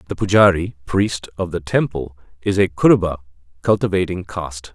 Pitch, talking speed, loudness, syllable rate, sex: 90 Hz, 140 wpm, -19 LUFS, 5.2 syllables/s, male